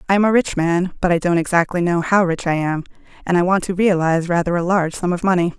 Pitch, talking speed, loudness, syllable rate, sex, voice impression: 175 Hz, 270 wpm, -18 LUFS, 6.5 syllables/s, female, feminine, adult-like, tensed, powerful, clear, fluent, intellectual, calm, elegant, lively, slightly strict, slightly sharp